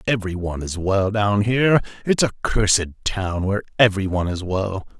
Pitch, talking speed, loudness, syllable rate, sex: 100 Hz, 180 wpm, -21 LUFS, 6.0 syllables/s, male